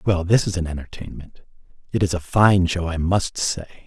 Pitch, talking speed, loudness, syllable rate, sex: 90 Hz, 200 wpm, -21 LUFS, 5.2 syllables/s, male